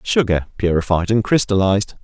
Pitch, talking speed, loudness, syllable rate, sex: 100 Hz, 120 wpm, -17 LUFS, 5.6 syllables/s, male